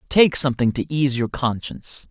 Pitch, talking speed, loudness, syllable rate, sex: 135 Hz, 170 wpm, -20 LUFS, 5.2 syllables/s, male